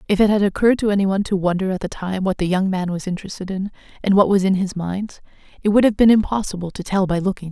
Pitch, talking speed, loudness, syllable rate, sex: 195 Hz, 290 wpm, -19 LUFS, 7.2 syllables/s, female